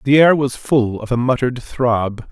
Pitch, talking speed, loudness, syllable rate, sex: 125 Hz, 205 wpm, -17 LUFS, 4.6 syllables/s, male